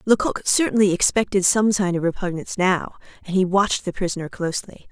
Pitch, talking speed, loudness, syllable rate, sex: 190 Hz, 170 wpm, -21 LUFS, 6.0 syllables/s, female